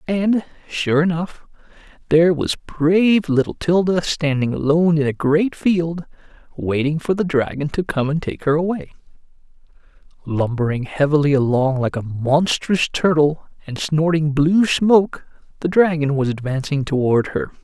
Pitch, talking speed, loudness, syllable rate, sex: 155 Hz, 140 wpm, -18 LUFS, 4.6 syllables/s, male